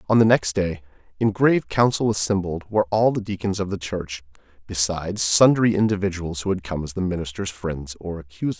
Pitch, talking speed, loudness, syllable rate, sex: 95 Hz, 190 wpm, -22 LUFS, 5.7 syllables/s, male